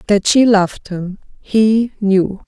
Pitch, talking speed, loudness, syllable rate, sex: 205 Hz, 145 wpm, -15 LUFS, 3.5 syllables/s, female